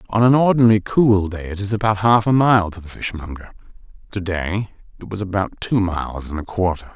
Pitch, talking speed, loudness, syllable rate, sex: 100 Hz, 205 wpm, -19 LUFS, 5.6 syllables/s, male